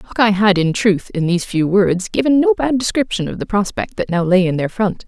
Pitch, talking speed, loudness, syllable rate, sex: 195 Hz, 250 wpm, -16 LUFS, 5.4 syllables/s, female